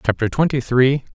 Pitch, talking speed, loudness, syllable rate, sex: 130 Hz, 155 wpm, -18 LUFS, 5.3 syllables/s, male